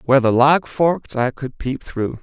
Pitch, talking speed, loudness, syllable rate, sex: 130 Hz, 215 wpm, -18 LUFS, 4.8 syllables/s, male